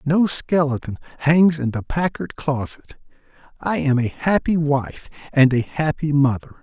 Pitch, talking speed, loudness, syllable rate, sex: 145 Hz, 145 wpm, -20 LUFS, 4.3 syllables/s, male